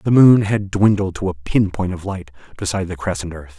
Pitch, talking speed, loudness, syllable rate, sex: 95 Hz, 235 wpm, -18 LUFS, 5.5 syllables/s, male